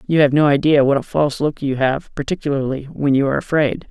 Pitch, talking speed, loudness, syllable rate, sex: 140 Hz, 230 wpm, -17 LUFS, 6.2 syllables/s, male